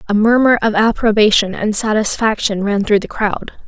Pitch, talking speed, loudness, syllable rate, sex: 215 Hz, 165 wpm, -14 LUFS, 5.0 syllables/s, female